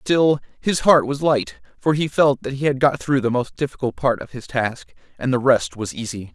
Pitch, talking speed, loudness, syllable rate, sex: 135 Hz, 235 wpm, -20 LUFS, 5.0 syllables/s, male